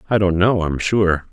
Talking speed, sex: 225 wpm, male